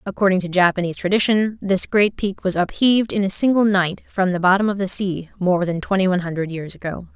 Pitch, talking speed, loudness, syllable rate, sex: 190 Hz, 220 wpm, -19 LUFS, 6.0 syllables/s, female